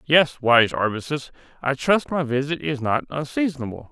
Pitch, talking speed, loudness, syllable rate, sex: 140 Hz, 140 wpm, -22 LUFS, 5.0 syllables/s, male